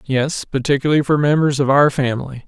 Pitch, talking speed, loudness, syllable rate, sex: 140 Hz, 170 wpm, -17 LUFS, 6.1 syllables/s, male